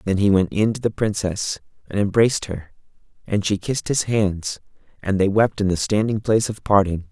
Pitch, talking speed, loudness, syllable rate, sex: 100 Hz, 200 wpm, -21 LUFS, 5.4 syllables/s, male